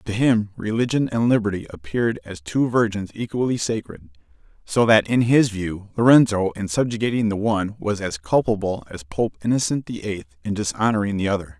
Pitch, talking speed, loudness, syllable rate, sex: 105 Hz, 170 wpm, -21 LUFS, 5.5 syllables/s, male